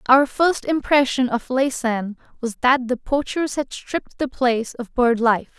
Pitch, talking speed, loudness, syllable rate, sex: 255 Hz, 170 wpm, -20 LUFS, 4.3 syllables/s, female